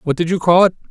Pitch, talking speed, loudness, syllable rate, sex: 175 Hz, 330 wpm, -14 LUFS, 7.7 syllables/s, male